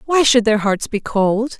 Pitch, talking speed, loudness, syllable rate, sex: 230 Hz, 225 wpm, -16 LUFS, 4.1 syllables/s, female